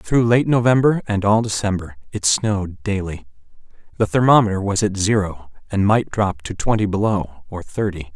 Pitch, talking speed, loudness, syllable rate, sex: 100 Hz, 160 wpm, -19 LUFS, 5.0 syllables/s, male